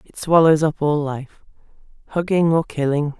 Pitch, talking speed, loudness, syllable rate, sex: 155 Hz, 150 wpm, -18 LUFS, 4.6 syllables/s, female